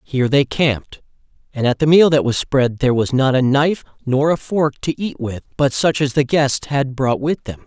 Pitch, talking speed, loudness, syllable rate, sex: 135 Hz, 235 wpm, -17 LUFS, 5.1 syllables/s, male